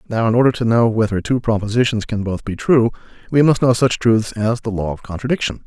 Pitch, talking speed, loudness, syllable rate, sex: 115 Hz, 235 wpm, -17 LUFS, 6.0 syllables/s, male